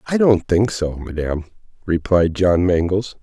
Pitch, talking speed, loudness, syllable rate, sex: 95 Hz, 150 wpm, -18 LUFS, 4.1 syllables/s, male